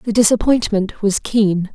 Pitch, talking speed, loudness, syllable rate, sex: 210 Hz, 140 wpm, -16 LUFS, 4.3 syllables/s, female